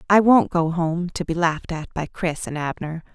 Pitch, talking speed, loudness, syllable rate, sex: 170 Hz, 230 wpm, -22 LUFS, 5.0 syllables/s, female